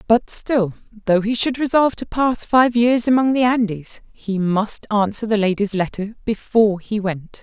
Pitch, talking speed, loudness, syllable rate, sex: 215 Hz, 180 wpm, -19 LUFS, 4.6 syllables/s, female